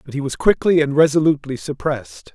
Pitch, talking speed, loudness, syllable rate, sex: 145 Hz, 180 wpm, -18 LUFS, 6.3 syllables/s, male